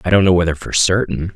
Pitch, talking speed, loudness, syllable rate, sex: 90 Hz, 265 wpm, -16 LUFS, 6.4 syllables/s, male